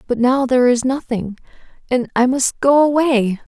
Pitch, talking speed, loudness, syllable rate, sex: 250 Hz, 170 wpm, -16 LUFS, 4.8 syllables/s, female